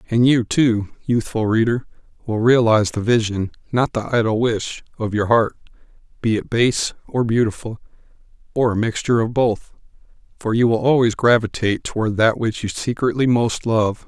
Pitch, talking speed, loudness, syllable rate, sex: 115 Hz, 160 wpm, -19 LUFS, 4.9 syllables/s, male